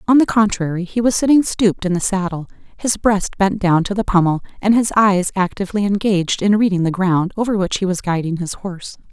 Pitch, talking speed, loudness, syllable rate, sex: 195 Hz, 215 wpm, -17 LUFS, 5.8 syllables/s, female